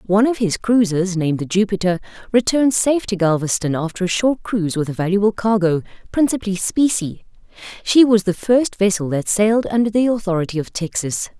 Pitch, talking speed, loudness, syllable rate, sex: 200 Hz, 175 wpm, -18 LUFS, 5.8 syllables/s, female